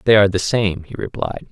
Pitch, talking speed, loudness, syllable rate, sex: 100 Hz, 240 wpm, -19 LUFS, 6.2 syllables/s, male